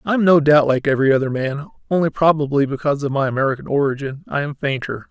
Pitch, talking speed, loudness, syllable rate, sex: 145 Hz, 210 wpm, -18 LUFS, 6.8 syllables/s, male